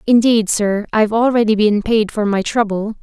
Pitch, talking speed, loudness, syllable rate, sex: 215 Hz, 180 wpm, -15 LUFS, 5.0 syllables/s, female